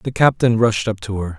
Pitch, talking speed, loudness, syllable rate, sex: 110 Hz, 260 wpm, -18 LUFS, 5.2 syllables/s, male